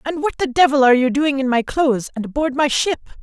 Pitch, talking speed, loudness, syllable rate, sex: 275 Hz, 260 wpm, -17 LUFS, 6.5 syllables/s, female